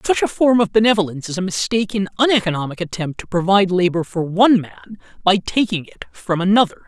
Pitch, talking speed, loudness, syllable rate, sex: 190 Hz, 185 wpm, -18 LUFS, 6.4 syllables/s, male